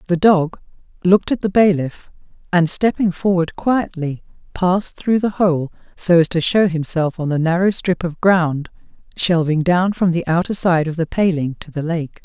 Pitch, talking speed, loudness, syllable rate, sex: 175 Hz, 180 wpm, -18 LUFS, 4.7 syllables/s, female